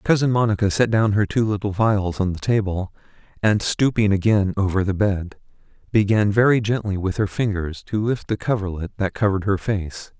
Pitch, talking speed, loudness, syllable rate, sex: 100 Hz, 180 wpm, -21 LUFS, 5.3 syllables/s, male